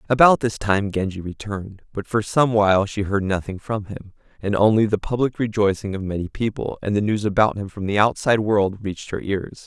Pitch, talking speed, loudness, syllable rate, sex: 105 Hz, 210 wpm, -21 LUFS, 5.5 syllables/s, male